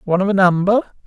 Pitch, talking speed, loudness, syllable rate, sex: 195 Hz, 225 wpm, -16 LUFS, 8.3 syllables/s, male